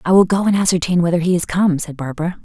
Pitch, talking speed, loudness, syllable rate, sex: 175 Hz, 270 wpm, -17 LUFS, 6.9 syllables/s, female